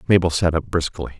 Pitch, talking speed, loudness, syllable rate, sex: 85 Hz, 200 wpm, -20 LUFS, 6.1 syllables/s, male